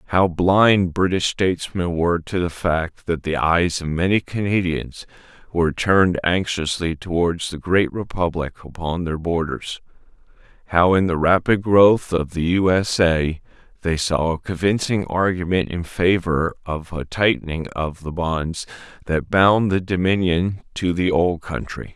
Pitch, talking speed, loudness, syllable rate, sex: 85 Hz, 150 wpm, -20 LUFS, 4.3 syllables/s, male